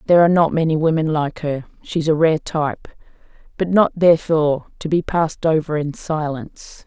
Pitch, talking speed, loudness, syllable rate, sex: 155 Hz, 175 wpm, -18 LUFS, 5.7 syllables/s, female